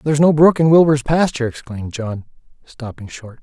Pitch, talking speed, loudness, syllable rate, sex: 140 Hz, 175 wpm, -15 LUFS, 5.8 syllables/s, male